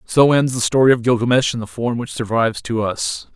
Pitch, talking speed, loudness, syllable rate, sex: 120 Hz, 230 wpm, -17 LUFS, 5.6 syllables/s, male